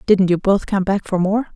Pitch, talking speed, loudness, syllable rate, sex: 195 Hz, 270 wpm, -18 LUFS, 5.3 syllables/s, female